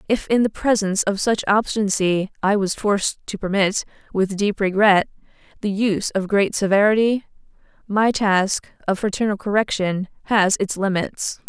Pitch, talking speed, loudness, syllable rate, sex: 200 Hz, 145 wpm, -20 LUFS, 4.9 syllables/s, female